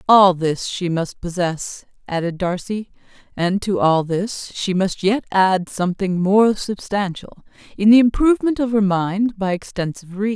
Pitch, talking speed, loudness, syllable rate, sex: 195 Hz, 155 wpm, -19 LUFS, 4.5 syllables/s, female